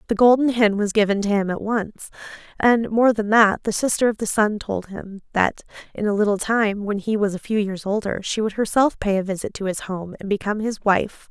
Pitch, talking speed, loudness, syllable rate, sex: 210 Hz, 240 wpm, -21 LUFS, 5.4 syllables/s, female